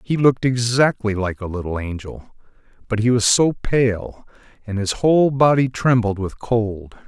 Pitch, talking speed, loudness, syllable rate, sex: 115 Hz, 160 wpm, -19 LUFS, 4.5 syllables/s, male